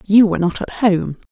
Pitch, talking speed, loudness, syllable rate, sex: 195 Hz, 230 wpm, -17 LUFS, 5.5 syllables/s, female